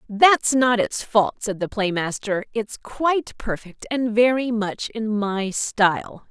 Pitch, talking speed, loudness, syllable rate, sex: 220 Hz, 160 wpm, -21 LUFS, 3.8 syllables/s, female